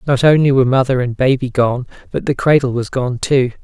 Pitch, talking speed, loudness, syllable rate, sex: 130 Hz, 215 wpm, -15 LUFS, 5.7 syllables/s, male